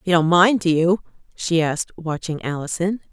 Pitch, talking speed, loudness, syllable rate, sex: 170 Hz, 175 wpm, -20 LUFS, 5.1 syllables/s, female